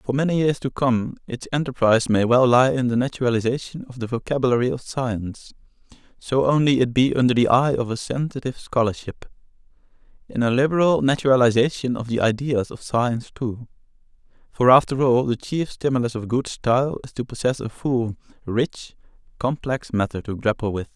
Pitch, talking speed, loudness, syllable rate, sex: 125 Hz, 165 wpm, -21 LUFS, 5.6 syllables/s, male